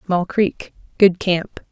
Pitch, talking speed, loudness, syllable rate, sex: 185 Hz, 105 wpm, -18 LUFS, 3.1 syllables/s, female